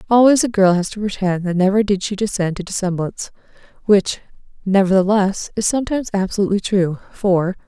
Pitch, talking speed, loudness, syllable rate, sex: 195 Hz, 155 wpm, -18 LUFS, 6.0 syllables/s, female